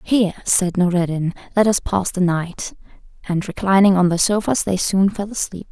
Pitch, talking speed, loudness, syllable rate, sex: 185 Hz, 180 wpm, -18 LUFS, 5.0 syllables/s, female